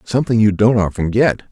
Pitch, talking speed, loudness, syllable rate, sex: 110 Hz, 200 wpm, -15 LUFS, 5.8 syllables/s, male